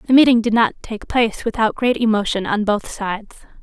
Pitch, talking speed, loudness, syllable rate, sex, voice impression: 220 Hz, 200 wpm, -18 LUFS, 5.4 syllables/s, female, feminine, adult-like, tensed, bright, slightly soft, clear, slightly raspy, slightly refreshing, friendly, reassuring, lively, kind